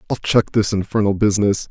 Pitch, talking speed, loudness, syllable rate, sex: 100 Hz, 175 wpm, -18 LUFS, 6.3 syllables/s, male